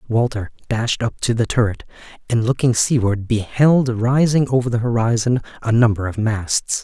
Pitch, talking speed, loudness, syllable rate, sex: 115 Hz, 160 wpm, -18 LUFS, 4.8 syllables/s, male